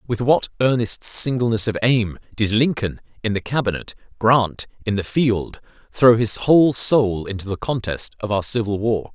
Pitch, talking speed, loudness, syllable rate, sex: 115 Hz, 170 wpm, -19 LUFS, 4.7 syllables/s, male